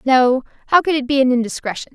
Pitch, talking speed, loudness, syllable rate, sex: 265 Hz, 215 wpm, -17 LUFS, 6.4 syllables/s, female